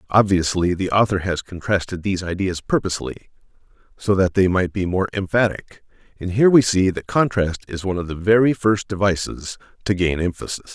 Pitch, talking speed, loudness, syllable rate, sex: 95 Hz, 175 wpm, -20 LUFS, 5.6 syllables/s, male